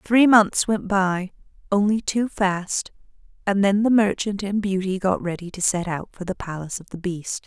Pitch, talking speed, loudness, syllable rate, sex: 195 Hz, 195 wpm, -22 LUFS, 4.7 syllables/s, female